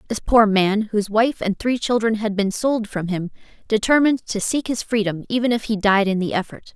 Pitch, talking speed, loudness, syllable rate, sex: 215 Hz, 220 wpm, -20 LUFS, 5.4 syllables/s, female